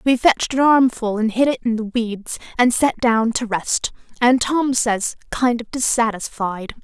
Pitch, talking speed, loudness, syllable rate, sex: 235 Hz, 185 wpm, -19 LUFS, 4.4 syllables/s, female